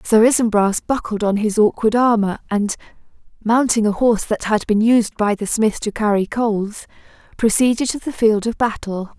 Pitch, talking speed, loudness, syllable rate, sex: 220 Hz, 175 wpm, -18 LUFS, 5.1 syllables/s, female